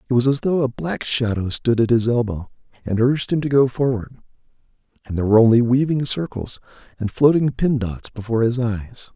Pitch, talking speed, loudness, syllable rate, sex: 125 Hz, 195 wpm, -19 LUFS, 5.8 syllables/s, male